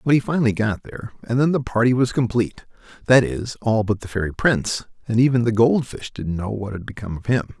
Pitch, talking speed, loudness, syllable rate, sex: 115 Hz, 230 wpm, -21 LUFS, 6.2 syllables/s, male